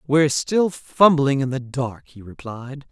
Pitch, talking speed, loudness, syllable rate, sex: 140 Hz, 165 wpm, -19 LUFS, 4.1 syllables/s, female